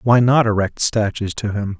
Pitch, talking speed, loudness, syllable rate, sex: 105 Hz, 200 wpm, -18 LUFS, 4.6 syllables/s, male